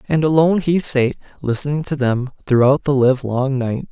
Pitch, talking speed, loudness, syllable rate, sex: 135 Hz, 170 wpm, -17 LUFS, 5.0 syllables/s, male